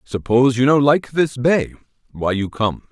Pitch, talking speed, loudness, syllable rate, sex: 130 Hz, 185 wpm, -17 LUFS, 4.7 syllables/s, male